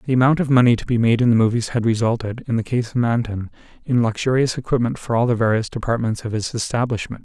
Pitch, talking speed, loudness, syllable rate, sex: 115 Hz, 230 wpm, -19 LUFS, 6.5 syllables/s, male